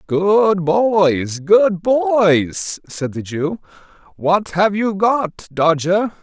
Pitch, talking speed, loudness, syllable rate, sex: 180 Hz, 115 wpm, -16 LUFS, 2.4 syllables/s, male